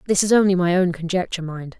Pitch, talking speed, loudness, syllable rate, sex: 180 Hz, 235 wpm, -19 LUFS, 6.9 syllables/s, female